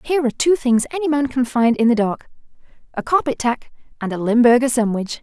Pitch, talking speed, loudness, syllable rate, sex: 250 Hz, 195 wpm, -18 LUFS, 6.1 syllables/s, female